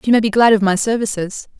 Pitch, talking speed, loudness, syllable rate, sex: 215 Hz, 265 wpm, -15 LUFS, 6.4 syllables/s, female